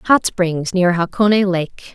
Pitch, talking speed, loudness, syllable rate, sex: 185 Hz, 155 wpm, -16 LUFS, 3.7 syllables/s, female